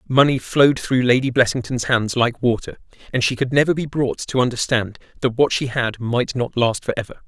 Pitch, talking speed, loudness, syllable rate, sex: 125 Hz, 205 wpm, -19 LUFS, 5.4 syllables/s, male